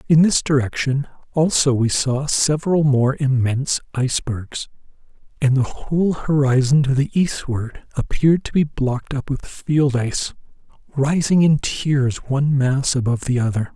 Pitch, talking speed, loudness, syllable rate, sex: 135 Hz, 145 wpm, -19 LUFS, 4.7 syllables/s, male